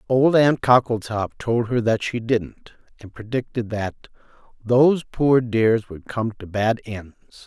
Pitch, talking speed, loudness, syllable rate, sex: 115 Hz, 155 wpm, -21 LUFS, 4.1 syllables/s, male